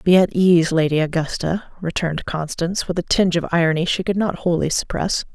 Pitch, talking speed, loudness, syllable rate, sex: 170 Hz, 190 wpm, -19 LUFS, 5.7 syllables/s, female